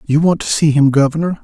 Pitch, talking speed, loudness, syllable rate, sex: 150 Hz, 250 wpm, -13 LUFS, 6.1 syllables/s, male